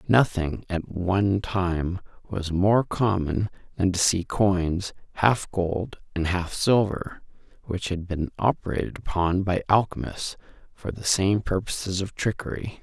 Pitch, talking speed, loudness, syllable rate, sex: 95 Hz, 135 wpm, -25 LUFS, 4.0 syllables/s, male